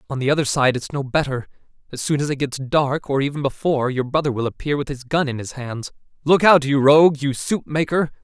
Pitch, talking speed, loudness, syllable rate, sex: 140 Hz, 240 wpm, -20 LUFS, 5.9 syllables/s, male